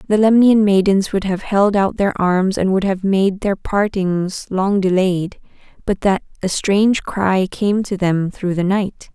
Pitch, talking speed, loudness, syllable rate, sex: 195 Hz, 185 wpm, -17 LUFS, 4.0 syllables/s, female